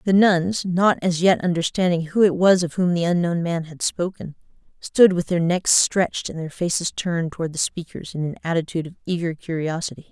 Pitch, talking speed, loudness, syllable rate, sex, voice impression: 170 Hz, 200 wpm, -21 LUFS, 5.5 syllables/s, female, very feminine, middle-aged, slightly thin, tensed, powerful, slightly dark, hard, clear, fluent, cool, intellectual, slightly refreshing, very sincere, very calm, friendly, very reassuring, slightly unique, very elegant, slightly wild, sweet, slightly lively, strict, slightly modest